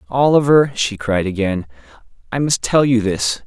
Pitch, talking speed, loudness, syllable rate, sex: 115 Hz, 155 wpm, -16 LUFS, 4.7 syllables/s, male